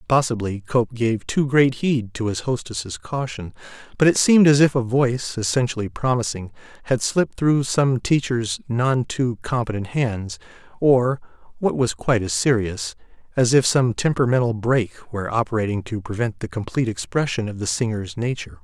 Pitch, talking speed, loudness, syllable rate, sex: 120 Hz, 155 wpm, -21 LUFS, 5.2 syllables/s, male